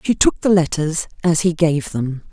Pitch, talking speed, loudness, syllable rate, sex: 160 Hz, 205 wpm, -18 LUFS, 4.4 syllables/s, female